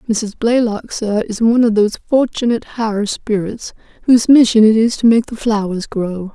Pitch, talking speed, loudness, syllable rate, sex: 220 Hz, 180 wpm, -15 LUFS, 5.4 syllables/s, female